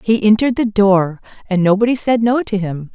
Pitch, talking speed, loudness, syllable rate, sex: 210 Hz, 205 wpm, -15 LUFS, 5.4 syllables/s, female